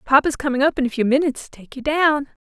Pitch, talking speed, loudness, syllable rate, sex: 275 Hz, 290 wpm, -19 LUFS, 7.3 syllables/s, female